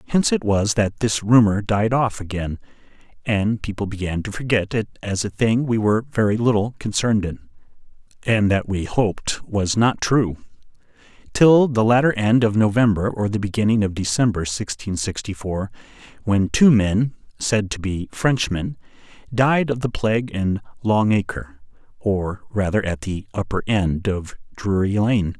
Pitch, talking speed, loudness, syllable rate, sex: 105 Hz, 160 wpm, -20 LUFS, 4.7 syllables/s, male